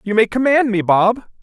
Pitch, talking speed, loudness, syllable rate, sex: 220 Hz, 210 wpm, -15 LUFS, 4.9 syllables/s, male